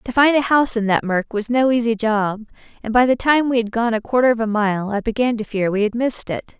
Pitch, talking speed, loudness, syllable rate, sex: 230 Hz, 280 wpm, -18 LUFS, 5.9 syllables/s, female